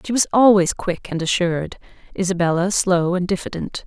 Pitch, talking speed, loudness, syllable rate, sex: 185 Hz, 155 wpm, -19 LUFS, 5.5 syllables/s, female